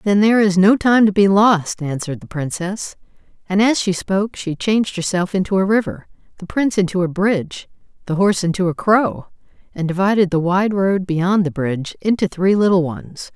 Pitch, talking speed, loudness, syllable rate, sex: 190 Hz, 195 wpm, -17 LUFS, 5.4 syllables/s, female